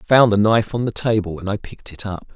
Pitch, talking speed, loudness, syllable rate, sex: 105 Hz, 305 wpm, -19 LUFS, 6.7 syllables/s, male